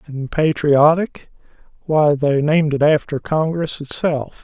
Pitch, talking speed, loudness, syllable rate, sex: 150 Hz, 110 wpm, -17 LUFS, 4.0 syllables/s, male